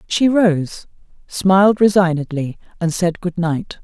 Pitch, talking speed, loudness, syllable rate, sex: 180 Hz, 125 wpm, -16 LUFS, 4.0 syllables/s, female